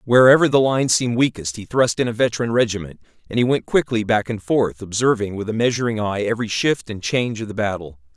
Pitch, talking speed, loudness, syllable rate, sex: 110 Hz, 220 wpm, -19 LUFS, 6.2 syllables/s, male